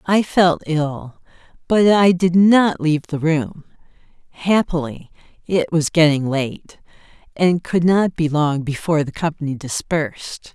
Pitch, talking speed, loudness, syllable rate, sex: 160 Hz, 135 wpm, -18 LUFS, 4.1 syllables/s, female